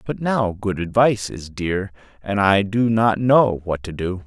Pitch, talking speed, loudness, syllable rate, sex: 100 Hz, 195 wpm, -20 LUFS, 4.2 syllables/s, male